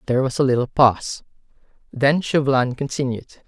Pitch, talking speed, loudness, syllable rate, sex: 135 Hz, 140 wpm, -20 LUFS, 6.2 syllables/s, male